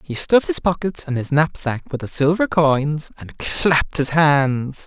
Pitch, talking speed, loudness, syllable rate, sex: 150 Hz, 185 wpm, -18 LUFS, 4.4 syllables/s, male